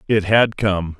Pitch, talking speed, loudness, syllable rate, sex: 100 Hz, 180 wpm, -17 LUFS, 3.7 syllables/s, male